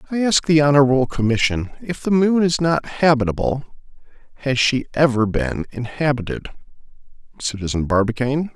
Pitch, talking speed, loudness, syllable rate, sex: 135 Hz, 125 wpm, -19 LUFS, 5.4 syllables/s, male